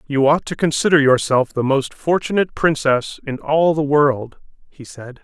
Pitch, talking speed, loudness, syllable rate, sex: 145 Hz, 170 wpm, -17 LUFS, 4.7 syllables/s, male